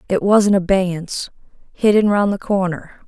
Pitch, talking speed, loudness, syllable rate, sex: 190 Hz, 135 wpm, -17 LUFS, 4.9 syllables/s, female